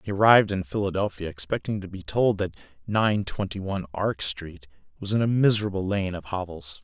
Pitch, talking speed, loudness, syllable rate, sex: 95 Hz, 185 wpm, -25 LUFS, 5.6 syllables/s, male